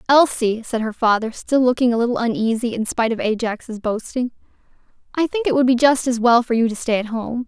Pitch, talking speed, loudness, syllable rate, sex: 240 Hz, 225 wpm, -19 LUFS, 5.8 syllables/s, female